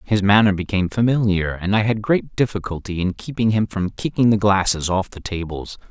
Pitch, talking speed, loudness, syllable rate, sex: 100 Hz, 195 wpm, -20 LUFS, 5.4 syllables/s, male